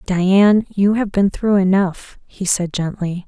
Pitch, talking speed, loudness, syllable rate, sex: 190 Hz, 165 wpm, -17 LUFS, 3.9 syllables/s, female